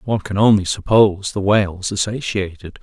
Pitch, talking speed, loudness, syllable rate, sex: 100 Hz, 170 wpm, -17 LUFS, 5.9 syllables/s, male